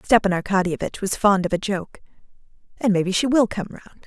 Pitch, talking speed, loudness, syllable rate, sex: 200 Hz, 190 wpm, -21 LUFS, 6.1 syllables/s, female